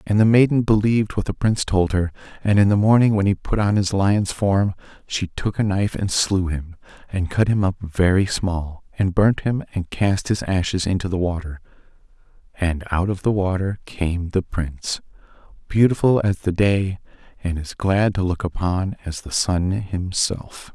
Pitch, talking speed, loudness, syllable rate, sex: 95 Hz, 190 wpm, -21 LUFS, 4.7 syllables/s, male